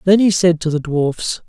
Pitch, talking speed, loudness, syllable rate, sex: 170 Hz, 245 wpm, -16 LUFS, 4.6 syllables/s, male